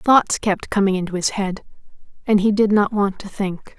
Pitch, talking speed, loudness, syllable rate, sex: 200 Hz, 205 wpm, -19 LUFS, 4.8 syllables/s, female